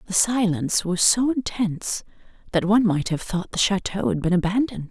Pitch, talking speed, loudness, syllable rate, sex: 200 Hz, 185 wpm, -22 LUFS, 5.6 syllables/s, female